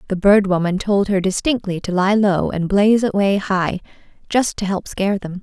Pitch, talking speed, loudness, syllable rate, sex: 195 Hz, 200 wpm, -18 LUFS, 5.1 syllables/s, female